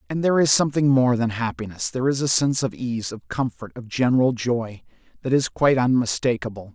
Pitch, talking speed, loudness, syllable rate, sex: 125 Hz, 195 wpm, -21 LUFS, 6.1 syllables/s, male